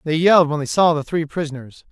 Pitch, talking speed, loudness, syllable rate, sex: 160 Hz, 250 wpm, -18 LUFS, 6.3 syllables/s, male